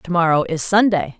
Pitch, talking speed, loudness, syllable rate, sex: 180 Hz, 200 wpm, -17 LUFS, 5.2 syllables/s, female